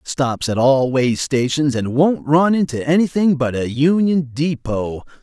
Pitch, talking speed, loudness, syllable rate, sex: 140 Hz, 160 wpm, -17 LUFS, 4.0 syllables/s, male